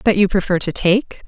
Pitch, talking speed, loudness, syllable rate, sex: 190 Hz, 235 wpm, -17 LUFS, 5.3 syllables/s, female